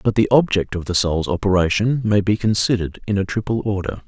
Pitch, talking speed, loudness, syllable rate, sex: 100 Hz, 205 wpm, -19 LUFS, 6.0 syllables/s, male